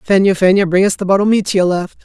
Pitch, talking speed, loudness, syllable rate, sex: 190 Hz, 235 wpm, -13 LUFS, 6.0 syllables/s, male